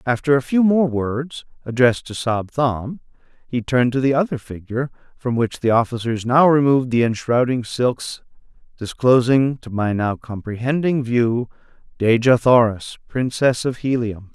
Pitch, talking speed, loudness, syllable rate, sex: 125 Hz, 145 wpm, -19 LUFS, 4.7 syllables/s, male